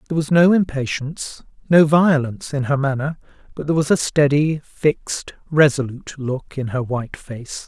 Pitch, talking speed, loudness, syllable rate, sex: 145 Hz, 165 wpm, -19 LUFS, 5.2 syllables/s, male